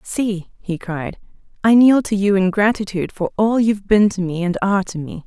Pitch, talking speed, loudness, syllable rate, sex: 200 Hz, 215 wpm, -18 LUFS, 5.3 syllables/s, female